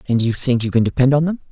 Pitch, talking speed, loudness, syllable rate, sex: 130 Hz, 315 wpm, -17 LUFS, 6.9 syllables/s, male